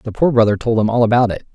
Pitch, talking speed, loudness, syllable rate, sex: 115 Hz, 310 wpm, -15 LUFS, 6.9 syllables/s, male